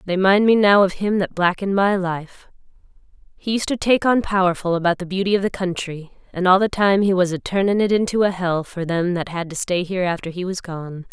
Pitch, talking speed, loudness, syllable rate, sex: 185 Hz, 245 wpm, -19 LUFS, 5.6 syllables/s, female